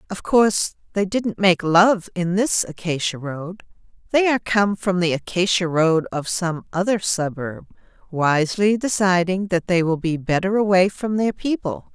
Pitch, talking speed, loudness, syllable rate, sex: 185 Hz, 160 wpm, -20 LUFS, 4.5 syllables/s, female